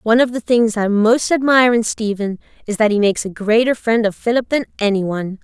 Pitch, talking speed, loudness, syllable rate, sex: 220 Hz, 230 wpm, -16 LUFS, 6.0 syllables/s, female